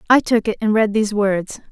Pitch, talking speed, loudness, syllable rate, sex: 215 Hz, 245 wpm, -18 LUFS, 5.8 syllables/s, female